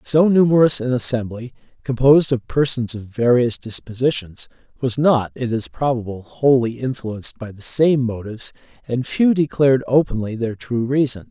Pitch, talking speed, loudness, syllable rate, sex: 125 Hz, 150 wpm, -19 LUFS, 5.0 syllables/s, male